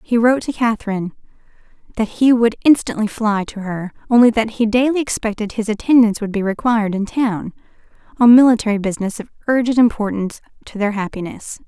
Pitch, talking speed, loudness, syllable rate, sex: 220 Hz, 165 wpm, -17 LUFS, 6.2 syllables/s, female